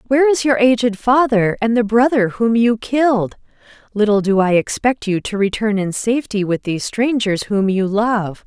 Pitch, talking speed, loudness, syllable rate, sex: 220 Hz, 185 wpm, -16 LUFS, 4.9 syllables/s, female